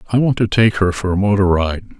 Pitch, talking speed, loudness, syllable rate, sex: 100 Hz, 270 wpm, -16 LUFS, 6.1 syllables/s, male